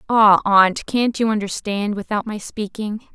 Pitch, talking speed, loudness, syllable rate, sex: 210 Hz, 155 wpm, -19 LUFS, 4.2 syllables/s, female